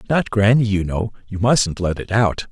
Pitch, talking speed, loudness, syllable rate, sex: 105 Hz, 190 wpm, -18 LUFS, 4.8 syllables/s, male